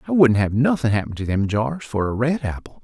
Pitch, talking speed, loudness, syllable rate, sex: 120 Hz, 255 wpm, -20 LUFS, 5.6 syllables/s, male